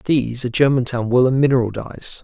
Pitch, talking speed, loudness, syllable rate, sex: 125 Hz, 190 wpm, -18 LUFS, 6.3 syllables/s, male